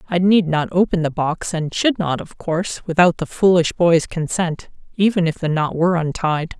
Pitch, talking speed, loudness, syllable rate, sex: 170 Hz, 200 wpm, -18 LUFS, 4.9 syllables/s, female